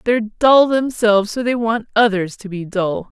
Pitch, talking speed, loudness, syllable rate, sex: 220 Hz, 190 wpm, -16 LUFS, 4.8 syllables/s, female